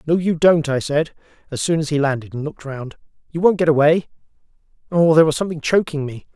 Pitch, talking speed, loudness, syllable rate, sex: 155 Hz, 215 wpm, -18 LUFS, 6.4 syllables/s, male